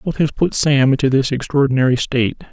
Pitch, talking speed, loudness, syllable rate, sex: 135 Hz, 190 wpm, -16 LUFS, 5.8 syllables/s, male